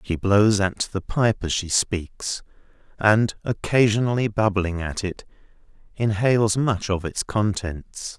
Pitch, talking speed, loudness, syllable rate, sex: 105 Hz, 130 wpm, -22 LUFS, 3.9 syllables/s, male